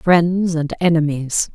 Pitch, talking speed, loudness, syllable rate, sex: 165 Hz, 115 wpm, -18 LUFS, 3.5 syllables/s, female